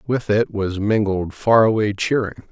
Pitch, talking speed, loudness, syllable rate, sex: 105 Hz, 165 wpm, -19 LUFS, 4.5 syllables/s, male